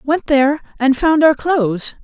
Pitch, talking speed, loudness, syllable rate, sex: 285 Hz, 175 wpm, -15 LUFS, 4.5 syllables/s, female